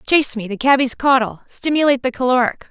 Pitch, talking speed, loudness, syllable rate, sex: 255 Hz, 180 wpm, -17 LUFS, 6.5 syllables/s, female